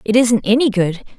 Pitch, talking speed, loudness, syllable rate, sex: 220 Hz, 205 wpm, -15 LUFS, 5.1 syllables/s, female